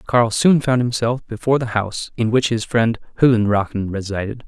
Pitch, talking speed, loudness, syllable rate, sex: 115 Hz, 175 wpm, -18 LUFS, 5.4 syllables/s, male